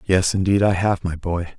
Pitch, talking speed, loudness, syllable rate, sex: 95 Hz, 230 wpm, -20 LUFS, 4.8 syllables/s, male